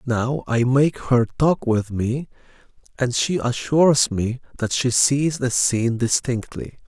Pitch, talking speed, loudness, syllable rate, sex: 125 Hz, 150 wpm, -20 LUFS, 3.9 syllables/s, male